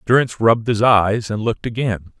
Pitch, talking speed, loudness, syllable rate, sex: 110 Hz, 190 wpm, -17 LUFS, 5.8 syllables/s, male